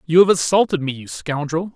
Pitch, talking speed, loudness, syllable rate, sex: 165 Hz, 205 wpm, -18 LUFS, 5.6 syllables/s, male